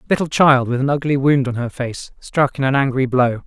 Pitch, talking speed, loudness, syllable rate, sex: 135 Hz, 240 wpm, -17 LUFS, 5.4 syllables/s, male